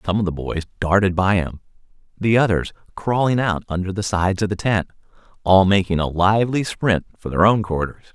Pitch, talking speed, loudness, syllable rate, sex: 95 Hz, 190 wpm, -19 LUFS, 5.6 syllables/s, male